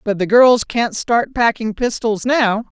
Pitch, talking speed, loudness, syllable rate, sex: 225 Hz, 170 wpm, -16 LUFS, 3.8 syllables/s, female